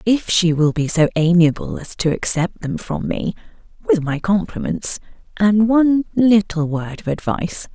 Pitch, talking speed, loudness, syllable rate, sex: 185 Hz, 165 wpm, -18 LUFS, 4.6 syllables/s, female